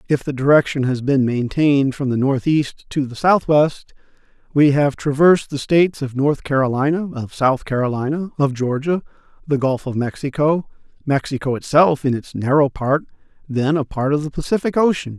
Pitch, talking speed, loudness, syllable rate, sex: 140 Hz, 165 wpm, -18 LUFS, 5.1 syllables/s, male